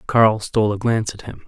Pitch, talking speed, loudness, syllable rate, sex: 110 Hz, 245 wpm, -19 LUFS, 6.0 syllables/s, male